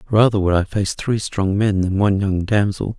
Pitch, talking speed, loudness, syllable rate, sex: 100 Hz, 220 wpm, -18 LUFS, 5.0 syllables/s, male